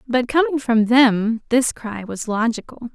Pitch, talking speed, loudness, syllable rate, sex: 235 Hz, 165 wpm, -19 LUFS, 4.0 syllables/s, female